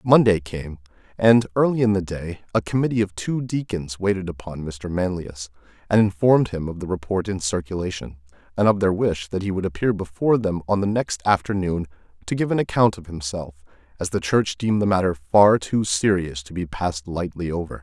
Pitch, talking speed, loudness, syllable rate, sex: 95 Hz, 195 wpm, -22 LUFS, 5.5 syllables/s, male